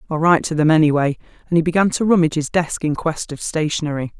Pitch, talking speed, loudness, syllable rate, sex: 160 Hz, 230 wpm, -18 LUFS, 6.8 syllables/s, female